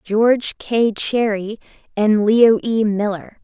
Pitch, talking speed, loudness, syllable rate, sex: 215 Hz, 120 wpm, -17 LUFS, 3.6 syllables/s, female